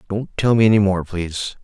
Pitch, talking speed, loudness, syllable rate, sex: 100 Hz, 220 wpm, -18 LUFS, 5.8 syllables/s, male